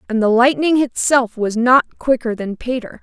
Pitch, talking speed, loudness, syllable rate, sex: 240 Hz, 180 wpm, -16 LUFS, 4.6 syllables/s, female